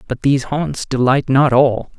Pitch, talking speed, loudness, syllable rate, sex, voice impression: 135 Hz, 180 wpm, -16 LUFS, 4.5 syllables/s, male, masculine, very adult-like, thick, tensed, powerful, dark, hard, slightly clear, fluent, cool, intellectual, very refreshing, sincere, very calm, slightly mature, friendly, reassuring, unique, slightly elegant, slightly wild, slightly sweet, slightly lively, kind, modest